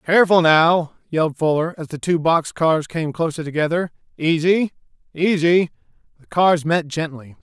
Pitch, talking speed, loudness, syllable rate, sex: 160 Hz, 135 wpm, -19 LUFS, 4.7 syllables/s, male